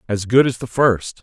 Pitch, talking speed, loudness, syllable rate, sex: 115 Hz, 245 wpm, -17 LUFS, 4.7 syllables/s, male